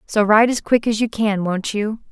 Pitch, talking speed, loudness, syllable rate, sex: 215 Hz, 255 wpm, -18 LUFS, 5.2 syllables/s, female